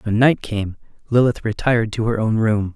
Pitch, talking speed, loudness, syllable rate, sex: 110 Hz, 195 wpm, -19 LUFS, 5.2 syllables/s, male